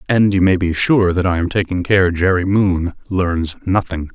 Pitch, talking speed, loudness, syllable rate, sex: 90 Hz, 205 wpm, -16 LUFS, 4.6 syllables/s, male